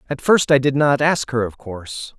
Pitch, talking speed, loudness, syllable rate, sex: 135 Hz, 245 wpm, -18 LUFS, 5.1 syllables/s, male